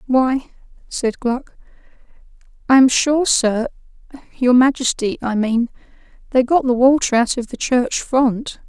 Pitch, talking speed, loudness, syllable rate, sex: 250 Hz, 125 wpm, -17 LUFS, 4.1 syllables/s, female